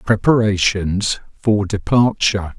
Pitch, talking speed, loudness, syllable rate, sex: 100 Hz, 70 wpm, -17 LUFS, 3.8 syllables/s, male